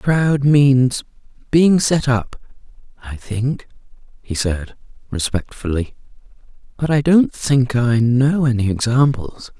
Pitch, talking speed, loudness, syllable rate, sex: 125 Hz, 115 wpm, -17 LUFS, 3.6 syllables/s, male